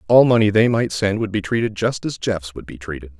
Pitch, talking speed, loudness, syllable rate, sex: 105 Hz, 265 wpm, -18 LUFS, 5.7 syllables/s, male